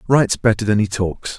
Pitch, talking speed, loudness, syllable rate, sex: 110 Hz, 215 wpm, -18 LUFS, 5.7 syllables/s, male